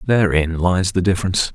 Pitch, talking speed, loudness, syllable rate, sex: 90 Hz, 155 wpm, -18 LUFS, 5.8 syllables/s, male